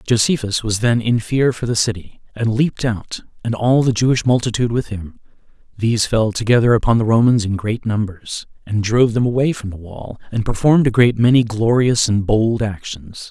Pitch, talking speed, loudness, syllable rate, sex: 115 Hz, 195 wpm, -17 LUFS, 5.4 syllables/s, male